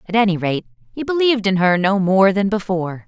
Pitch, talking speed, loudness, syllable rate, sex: 195 Hz, 215 wpm, -17 LUFS, 6.0 syllables/s, female